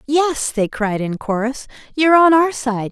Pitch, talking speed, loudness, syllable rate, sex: 260 Hz, 185 wpm, -17 LUFS, 4.4 syllables/s, female